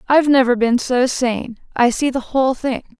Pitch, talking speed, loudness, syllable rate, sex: 250 Hz, 200 wpm, -17 LUFS, 5.2 syllables/s, female